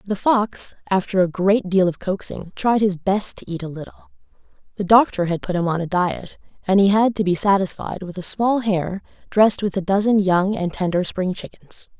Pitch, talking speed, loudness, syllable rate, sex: 190 Hz, 210 wpm, -20 LUFS, 5.1 syllables/s, female